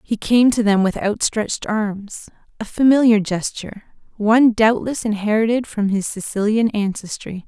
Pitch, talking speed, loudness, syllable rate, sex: 215 Hz, 130 wpm, -18 LUFS, 4.8 syllables/s, female